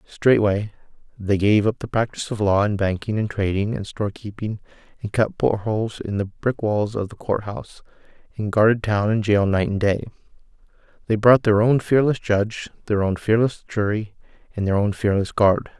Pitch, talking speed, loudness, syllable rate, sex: 105 Hz, 190 wpm, -21 LUFS, 5.3 syllables/s, male